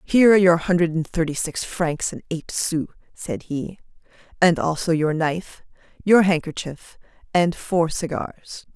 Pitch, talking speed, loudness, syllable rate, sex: 170 Hz, 150 wpm, -21 LUFS, 4.5 syllables/s, female